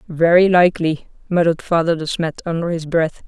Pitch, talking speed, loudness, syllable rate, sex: 165 Hz, 165 wpm, -17 LUFS, 5.6 syllables/s, female